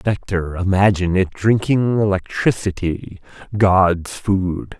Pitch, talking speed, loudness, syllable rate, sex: 95 Hz, 90 wpm, -18 LUFS, 3.7 syllables/s, male